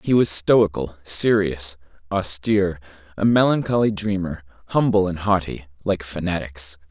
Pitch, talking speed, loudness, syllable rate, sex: 90 Hz, 115 wpm, -21 LUFS, 4.5 syllables/s, male